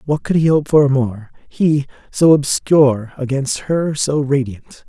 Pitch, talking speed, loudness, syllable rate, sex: 140 Hz, 150 wpm, -16 LUFS, 4.0 syllables/s, male